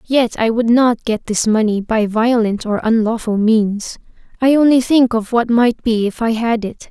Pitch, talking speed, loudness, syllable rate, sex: 225 Hz, 200 wpm, -15 LUFS, 4.4 syllables/s, female